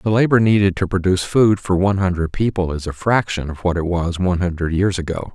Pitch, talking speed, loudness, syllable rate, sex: 95 Hz, 235 wpm, -18 LUFS, 6.0 syllables/s, male